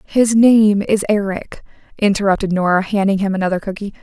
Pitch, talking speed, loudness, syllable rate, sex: 200 Hz, 150 wpm, -16 LUFS, 5.5 syllables/s, female